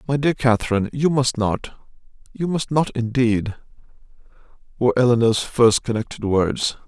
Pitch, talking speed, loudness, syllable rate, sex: 120 Hz, 120 wpm, -20 LUFS, 4.9 syllables/s, male